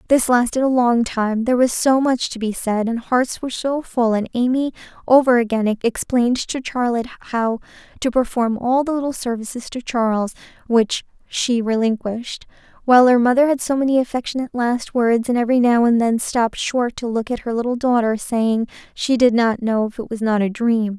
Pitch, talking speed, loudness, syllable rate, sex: 240 Hz, 195 wpm, -19 LUFS, 5.3 syllables/s, female